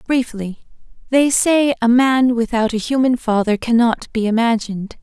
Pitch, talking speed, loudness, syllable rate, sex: 240 Hz, 145 wpm, -16 LUFS, 4.7 syllables/s, female